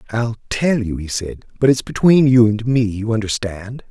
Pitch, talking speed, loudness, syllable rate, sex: 115 Hz, 200 wpm, -17 LUFS, 4.7 syllables/s, male